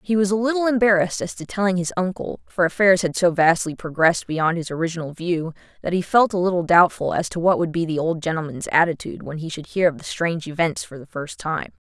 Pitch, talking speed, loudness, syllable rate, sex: 175 Hz, 240 wpm, -21 LUFS, 6.1 syllables/s, female